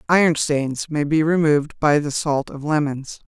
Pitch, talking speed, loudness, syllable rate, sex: 150 Hz, 180 wpm, -20 LUFS, 4.6 syllables/s, female